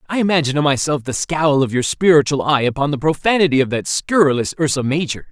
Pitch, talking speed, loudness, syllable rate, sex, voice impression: 145 Hz, 205 wpm, -17 LUFS, 6.3 syllables/s, male, masculine, slightly young, slightly adult-like, slightly thick, very tensed, powerful, very bright, hard, very clear, fluent, cool, slightly intellectual, very refreshing, very sincere, slightly calm, very friendly, very reassuring, unique, wild, slightly sweet, very lively, kind, intense, very light